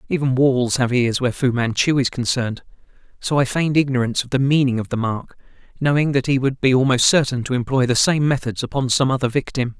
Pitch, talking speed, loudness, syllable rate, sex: 130 Hz, 215 wpm, -19 LUFS, 6.1 syllables/s, male